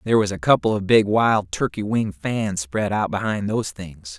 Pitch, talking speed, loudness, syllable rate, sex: 100 Hz, 215 wpm, -21 LUFS, 4.9 syllables/s, male